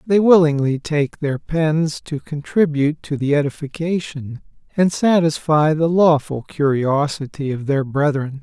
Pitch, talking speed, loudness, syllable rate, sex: 150 Hz, 130 wpm, -18 LUFS, 4.3 syllables/s, male